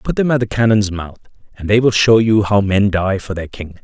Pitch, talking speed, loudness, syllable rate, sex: 105 Hz, 265 wpm, -15 LUFS, 5.5 syllables/s, male